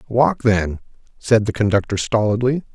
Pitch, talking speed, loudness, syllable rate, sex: 110 Hz, 130 wpm, -18 LUFS, 4.7 syllables/s, male